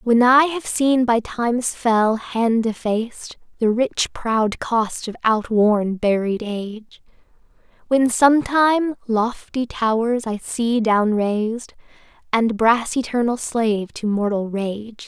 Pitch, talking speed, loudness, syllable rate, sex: 230 Hz, 130 wpm, -19 LUFS, 3.6 syllables/s, female